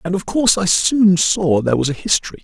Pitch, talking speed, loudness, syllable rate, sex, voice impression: 185 Hz, 245 wpm, -15 LUFS, 6.0 syllables/s, male, masculine, middle-aged, slightly relaxed, powerful, hard, raspy, mature, unique, wild, lively, intense